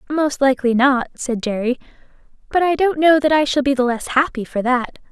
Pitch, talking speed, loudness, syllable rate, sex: 270 Hz, 210 wpm, -18 LUFS, 5.4 syllables/s, female